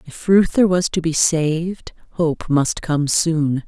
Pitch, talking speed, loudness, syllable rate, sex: 165 Hz, 165 wpm, -18 LUFS, 3.6 syllables/s, female